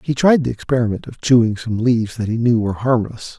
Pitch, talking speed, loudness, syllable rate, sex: 120 Hz, 230 wpm, -18 LUFS, 6.1 syllables/s, male